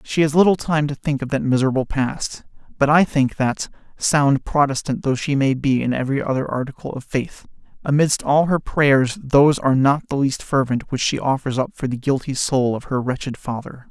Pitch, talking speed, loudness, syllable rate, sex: 140 Hz, 205 wpm, -19 LUFS, 5.2 syllables/s, male